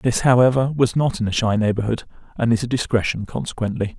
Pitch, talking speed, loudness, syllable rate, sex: 115 Hz, 195 wpm, -20 LUFS, 6.1 syllables/s, male